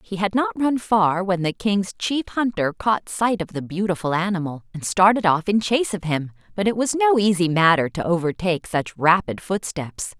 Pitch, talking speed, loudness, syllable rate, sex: 190 Hz, 200 wpm, -21 LUFS, 5.0 syllables/s, female